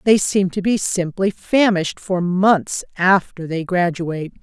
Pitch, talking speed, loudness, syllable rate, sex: 185 Hz, 150 wpm, -18 LUFS, 4.2 syllables/s, female